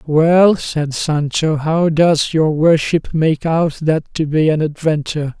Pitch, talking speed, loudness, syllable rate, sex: 155 Hz, 155 wpm, -15 LUFS, 3.7 syllables/s, male